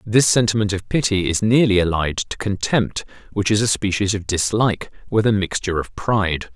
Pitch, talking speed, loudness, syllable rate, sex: 100 Hz, 185 wpm, -19 LUFS, 5.4 syllables/s, male